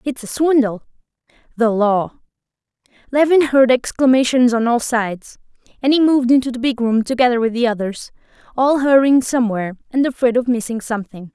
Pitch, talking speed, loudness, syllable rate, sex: 245 Hz, 160 wpm, -16 LUFS, 5.6 syllables/s, female